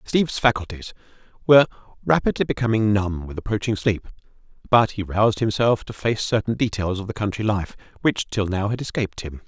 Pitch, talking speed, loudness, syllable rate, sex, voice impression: 105 Hz, 170 wpm, -22 LUFS, 5.8 syllables/s, male, masculine, middle-aged, tensed, powerful, clear, slightly fluent, slightly cool, friendly, unique, slightly wild, lively, slightly light